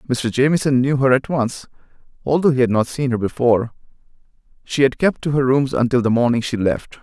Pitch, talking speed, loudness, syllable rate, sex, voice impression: 130 Hz, 205 wpm, -18 LUFS, 5.8 syllables/s, male, masculine, very adult-like, sincere, slightly mature, elegant, slightly wild